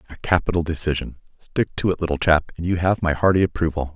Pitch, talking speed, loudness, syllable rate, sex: 85 Hz, 195 wpm, -21 LUFS, 6.3 syllables/s, male